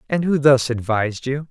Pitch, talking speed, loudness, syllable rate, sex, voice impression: 130 Hz, 200 wpm, -19 LUFS, 5.3 syllables/s, male, very masculine, slightly adult-like, thick, tensed, slightly weak, bright, soft, clear, fluent, cool, very intellectual, refreshing, very sincere, very calm, slightly mature, friendly, very reassuring, unique, very elegant, slightly wild, sweet, lively, very kind, modest